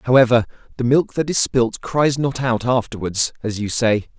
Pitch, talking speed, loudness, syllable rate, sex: 120 Hz, 185 wpm, -19 LUFS, 4.6 syllables/s, male